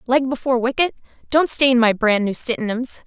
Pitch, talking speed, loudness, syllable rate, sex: 250 Hz, 155 wpm, -18 LUFS, 5.5 syllables/s, female